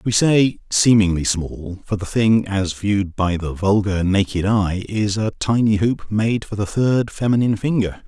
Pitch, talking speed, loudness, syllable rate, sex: 105 Hz, 180 wpm, -19 LUFS, 4.4 syllables/s, male